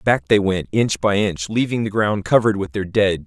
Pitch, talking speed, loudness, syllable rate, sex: 100 Hz, 240 wpm, -19 LUFS, 5.2 syllables/s, male